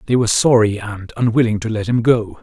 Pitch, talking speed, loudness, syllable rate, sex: 110 Hz, 225 wpm, -16 LUFS, 5.8 syllables/s, male